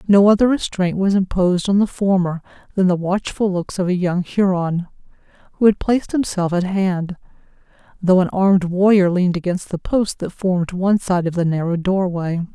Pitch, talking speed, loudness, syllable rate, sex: 185 Hz, 180 wpm, -18 LUFS, 5.3 syllables/s, female